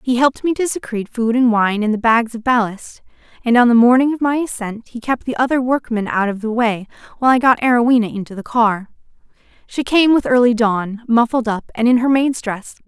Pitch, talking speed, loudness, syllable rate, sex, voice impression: 240 Hz, 225 wpm, -16 LUFS, 5.7 syllables/s, female, feminine, slightly adult-like, clear, intellectual, lively, slightly sharp